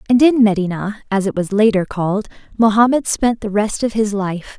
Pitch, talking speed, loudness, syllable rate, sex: 210 Hz, 195 wpm, -16 LUFS, 5.3 syllables/s, female